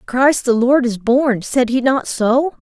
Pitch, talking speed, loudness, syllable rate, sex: 250 Hz, 200 wpm, -16 LUFS, 3.7 syllables/s, female